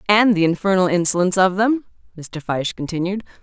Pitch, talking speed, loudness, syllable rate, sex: 185 Hz, 160 wpm, -18 LUFS, 6.2 syllables/s, female